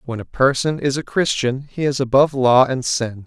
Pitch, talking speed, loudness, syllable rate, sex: 135 Hz, 220 wpm, -18 LUFS, 5.1 syllables/s, male